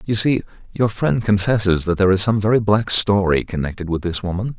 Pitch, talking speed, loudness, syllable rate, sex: 100 Hz, 210 wpm, -18 LUFS, 5.8 syllables/s, male